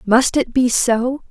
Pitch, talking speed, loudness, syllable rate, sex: 250 Hz, 185 wpm, -16 LUFS, 3.5 syllables/s, female